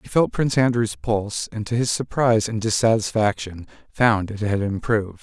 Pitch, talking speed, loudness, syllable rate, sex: 110 Hz, 170 wpm, -21 LUFS, 5.3 syllables/s, male